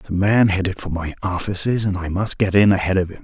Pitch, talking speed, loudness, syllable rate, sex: 95 Hz, 280 wpm, -19 LUFS, 6.8 syllables/s, male